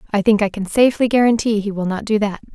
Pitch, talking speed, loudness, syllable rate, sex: 210 Hz, 260 wpm, -17 LUFS, 6.9 syllables/s, female